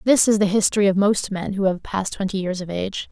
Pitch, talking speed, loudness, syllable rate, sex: 195 Hz, 270 wpm, -20 LUFS, 6.4 syllables/s, female